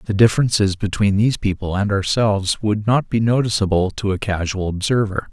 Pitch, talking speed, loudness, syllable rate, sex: 105 Hz, 170 wpm, -19 LUFS, 5.6 syllables/s, male